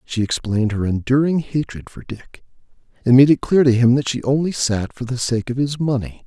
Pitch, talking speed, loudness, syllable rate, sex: 125 Hz, 220 wpm, -18 LUFS, 5.4 syllables/s, male